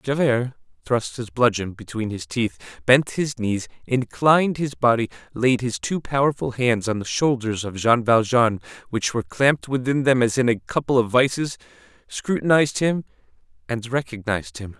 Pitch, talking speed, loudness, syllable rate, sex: 125 Hz, 160 wpm, -21 LUFS, 5.0 syllables/s, male